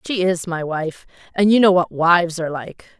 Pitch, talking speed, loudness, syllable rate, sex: 175 Hz, 220 wpm, -18 LUFS, 5.2 syllables/s, female